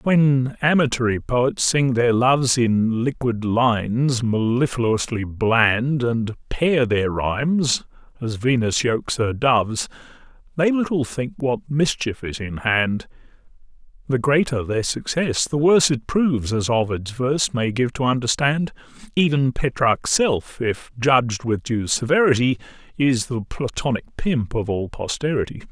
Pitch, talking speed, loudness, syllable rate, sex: 125 Hz, 135 wpm, -20 LUFS, 4.1 syllables/s, male